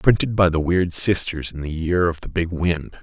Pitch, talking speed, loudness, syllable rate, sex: 85 Hz, 240 wpm, -21 LUFS, 4.7 syllables/s, male